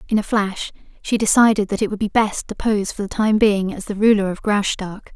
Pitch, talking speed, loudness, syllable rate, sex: 205 Hz, 245 wpm, -19 LUFS, 5.4 syllables/s, female